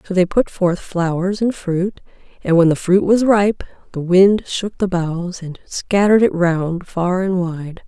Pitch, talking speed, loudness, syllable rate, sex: 185 Hz, 190 wpm, -17 LUFS, 4.0 syllables/s, female